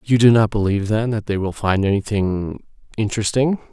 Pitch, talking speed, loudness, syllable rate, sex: 105 Hz, 160 wpm, -19 LUFS, 5.7 syllables/s, male